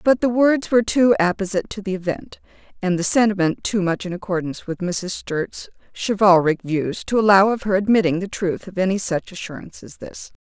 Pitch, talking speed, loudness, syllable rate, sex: 195 Hz, 195 wpm, -20 LUFS, 5.6 syllables/s, female